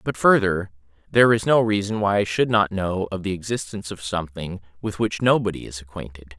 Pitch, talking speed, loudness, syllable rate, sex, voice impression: 95 Hz, 195 wpm, -22 LUFS, 5.9 syllables/s, male, masculine, adult-like, slightly thick, slightly refreshing, sincere, slightly unique